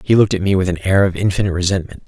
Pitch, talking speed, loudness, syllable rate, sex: 95 Hz, 290 wpm, -16 LUFS, 8.3 syllables/s, male